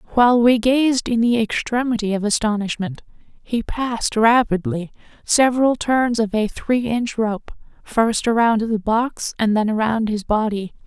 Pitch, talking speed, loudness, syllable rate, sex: 225 Hz, 150 wpm, -19 LUFS, 4.4 syllables/s, female